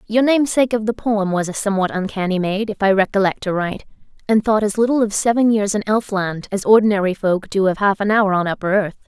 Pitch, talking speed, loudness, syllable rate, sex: 205 Hz, 225 wpm, -18 LUFS, 6.1 syllables/s, female